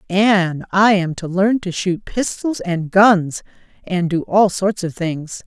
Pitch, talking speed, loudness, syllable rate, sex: 190 Hz, 175 wpm, -17 LUFS, 3.5 syllables/s, female